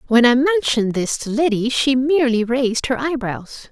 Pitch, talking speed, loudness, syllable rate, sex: 255 Hz, 180 wpm, -18 LUFS, 5.1 syllables/s, female